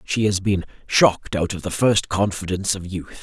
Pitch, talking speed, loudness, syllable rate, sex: 95 Hz, 205 wpm, -21 LUFS, 5.1 syllables/s, male